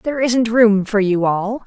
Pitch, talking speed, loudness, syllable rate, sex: 220 Hz, 215 wpm, -16 LUFS, 4.3 syllables/s, female